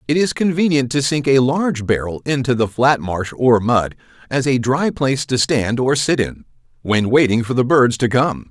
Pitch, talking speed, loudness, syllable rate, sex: 130 Hz, 210 wpm, -17 LUFS, 4.9 syllables/s, male